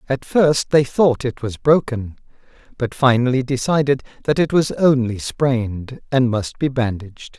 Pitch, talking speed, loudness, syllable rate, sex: 130 Hz, 155 wpm, -18 LUFS, 4.5 syllables/s, male